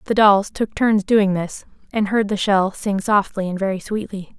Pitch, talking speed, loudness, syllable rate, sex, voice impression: 200 Hz, 205 wpm, -19 LUFS, 4.6 syllables/s, female, very feminine, adult-like, slightly muffled, fluent, slightly refreshing, slightly sincere, friendly